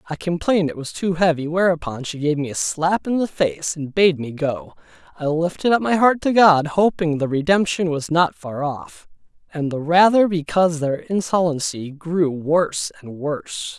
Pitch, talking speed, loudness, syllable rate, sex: 165 Hz, 185 wpm, -20 LUFS, 4.7 syllables/s, male